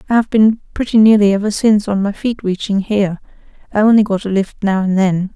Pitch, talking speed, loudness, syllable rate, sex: 205 Hz, 225 wpm, -14 LUFS, 6.0 syllables/s, female